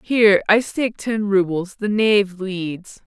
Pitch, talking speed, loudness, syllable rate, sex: 200 Hz, 150 wpm, -19 LUFS, 4.2 syllables/s, female